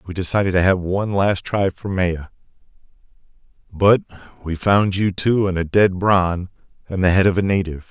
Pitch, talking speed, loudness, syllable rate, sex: 95 Hz, 180 wpm, -18 LUFS, 5.2 syllables/s, male